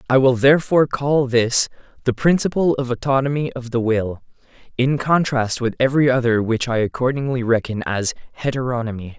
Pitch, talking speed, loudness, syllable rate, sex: 125 Hz, 150 wpm, -19 LUFS, 5.5 syllables/s, male